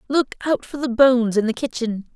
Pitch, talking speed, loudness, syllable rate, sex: 245 Hz, 225 wpm, -20 LUFS, 5.5 syllables/s, female